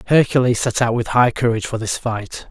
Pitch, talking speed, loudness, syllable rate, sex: 120 Hz, 215 wpm, -18 LUFS, 5.7 syllables/s, male